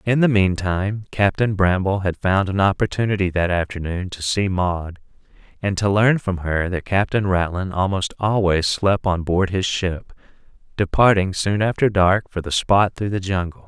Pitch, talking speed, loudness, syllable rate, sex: 95 Hz, 175 wpm, -20 LUFS, 4.6 syllables/s, male